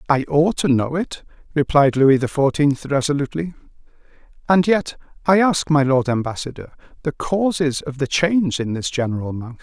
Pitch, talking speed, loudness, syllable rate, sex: 145 Hz, 160 wpm, -19 LUFS, 5.1 syllables/s, male